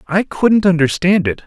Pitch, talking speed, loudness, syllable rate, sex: 175 Hz, 165 wpm, -14 LUFS, 4.6 syllables/s, male